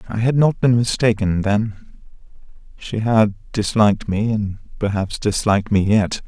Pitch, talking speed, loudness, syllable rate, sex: 105 Hz, 145 wpm, -19 LUFS, 4.5 syllables/s, male